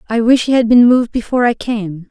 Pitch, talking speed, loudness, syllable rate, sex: 230 Hz, 255 wpm, -13 LUFS, 6.2 syllables/s, female